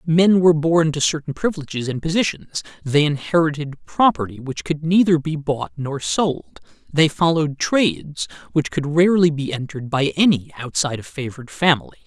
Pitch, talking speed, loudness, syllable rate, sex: 150 Hz, 160 wpm, -20 LUFS, 5.3 syllables/s, male